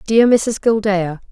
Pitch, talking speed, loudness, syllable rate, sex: 210 Hz, 135 wpm, -16 LUFS, 3.8 syllables/s, female